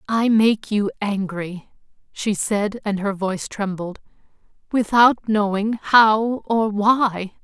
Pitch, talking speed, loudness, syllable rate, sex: 210 Hz, 120 wpm, -20 LUFS, 3.4 syllables/s, female